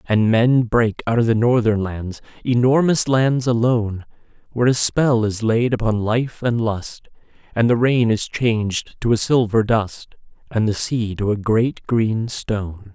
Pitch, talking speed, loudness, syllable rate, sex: 115 Hz, 170 wpm, -19 LUFS, 4.3 syllables/s, male